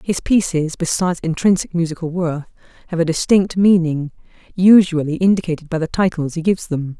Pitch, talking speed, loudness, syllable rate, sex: 170 Hz, 155 wpm, -17 LUFS, 5.7 syllables/s, female